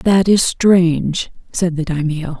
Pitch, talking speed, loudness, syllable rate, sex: 170 Hz, 150 wpm, -16 LUFS, 3.7 syllables/s, female